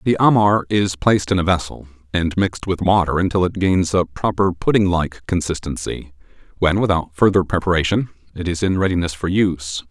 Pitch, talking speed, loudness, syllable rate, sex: 90 Hz, 175 wpm, -18 LUFS, 5.6 syllables/s, male